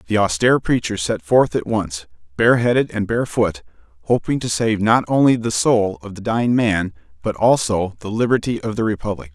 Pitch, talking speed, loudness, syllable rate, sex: 105 Hz, 180 wpm, -18 LUFS, 5.5 syllables/s, male